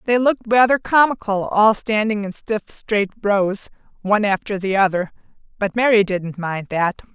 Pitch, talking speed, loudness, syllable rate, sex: 205 Hz, 170 wpm, -19 LUFS, 4.9 syllables/s, female